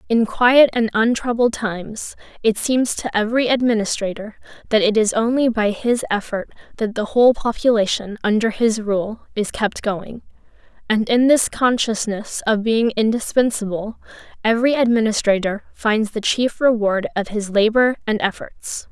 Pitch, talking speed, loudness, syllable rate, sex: 220 Hz, 145 wpm, -19 LUFS, 4.7 syllables/s, female